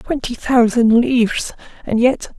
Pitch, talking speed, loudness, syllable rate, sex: 240 Hz, 125 wpm, -16 LUFS, 4.1 syllables/s, female